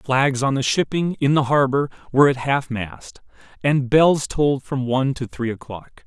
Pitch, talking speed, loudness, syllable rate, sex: 135 Hz, 190 wpm, -20 LUFS, 4.7 syllables/s, male